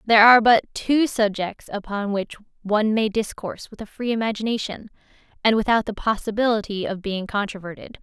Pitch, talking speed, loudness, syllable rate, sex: 215 Hz, 155 wpm, -21 LUFS, 5.8 syllables/s, female